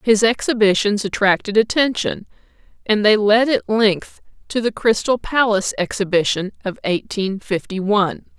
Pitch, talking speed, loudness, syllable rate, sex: 210 Hz, 130 wpm, -18 LUFS, 4.7 syllables/s, female